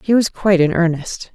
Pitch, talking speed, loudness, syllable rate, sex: 180 Hz, 225 wpm, -16 LUFS, 5.6 syllables/s, female